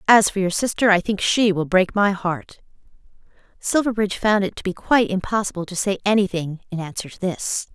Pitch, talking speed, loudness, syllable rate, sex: 195 Hz, 195 wpm, -21 LUFS, 5.6 syllables/s, female